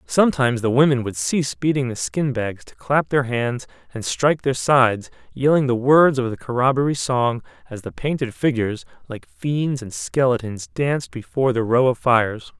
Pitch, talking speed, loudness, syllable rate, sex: 125 Hz, 180 wpm, -20 LUFS, 5.1 syllables/s, male